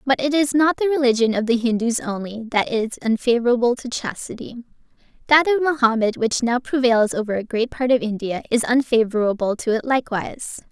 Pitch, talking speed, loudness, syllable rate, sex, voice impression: 240 Hz, 180 wpm, -20 LUFS, 5.8 syllables/s, female, very feminine, slightly young, tensed, clear, cute, slightly refreshing, slightly lively